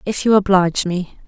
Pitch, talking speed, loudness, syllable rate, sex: 190 Hz, 190 wpm, -16 LUFS, 5.6 syllables/s, female